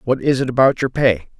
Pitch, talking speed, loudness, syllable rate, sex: 125 Hz, 260 wpm, -17 LUFS, 5.8 syllables/s, male